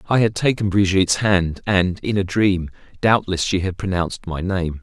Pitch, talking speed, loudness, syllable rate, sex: 95 Hz, 185 wpm, -19 LUFS, 4.9 syllables/s, male